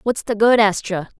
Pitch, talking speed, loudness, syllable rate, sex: 210 Hz, 200 wpm, -17 LUFS, 5.0 syllables/s, female